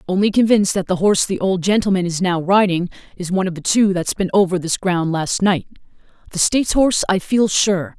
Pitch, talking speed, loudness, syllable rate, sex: 190 Hz, 210 wpm, -17 LUFS, 5.9 syllables/s, female